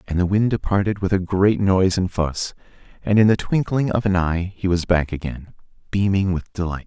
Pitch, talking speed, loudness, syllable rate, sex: 95 Hz, 210 wpm, -20 LUFS, 5.3 syllables/s, male